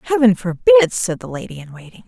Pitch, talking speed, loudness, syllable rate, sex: 180 Hz, 200 wpm, -15 LUFS, 6.0 syllables/s, female